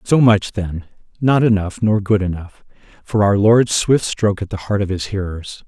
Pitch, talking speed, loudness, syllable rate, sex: 100 Hz, 180 wpm, -17 LUFS, 4.8 syllables/s, male